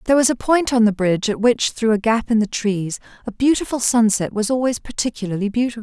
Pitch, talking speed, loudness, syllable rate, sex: 225 Hz, 225 wpm, -19 LUFS, 6.2 syllables/s, female